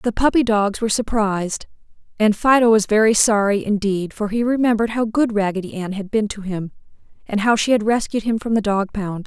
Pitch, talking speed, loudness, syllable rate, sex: 215 Hz, 205 wpm, -19 LUFS, 5.6 syllables/s, female